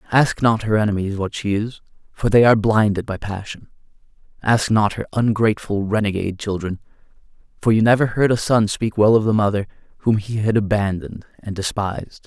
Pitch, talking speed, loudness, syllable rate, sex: 105 Hz, 175 wpm, -19 LUFS, 5.8 syllables/s, male